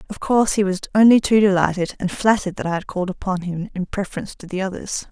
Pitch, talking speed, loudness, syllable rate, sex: 190 Hz, 235 wpm, -20 LUFS, 6.8 syllables/s, female